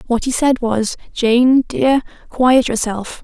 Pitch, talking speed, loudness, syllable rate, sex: 245 Hz, 150 wpm, -15 LUFS, 3.4 syllables/s, female